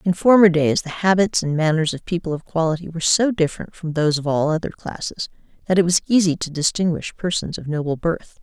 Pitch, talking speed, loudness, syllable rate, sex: 165 Hz, 215 wpm, -20 LUFS, 6.0 syllables/s, female